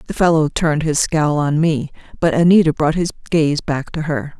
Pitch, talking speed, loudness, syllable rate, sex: 155 Hz, 205 wpm, -17 LUFS, 5.1 syllables/s, female